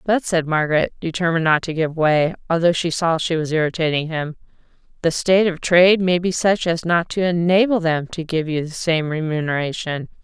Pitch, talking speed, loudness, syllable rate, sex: 165 Hz, 195 wpm, -19 LUFS, 5.5 syllables/s, female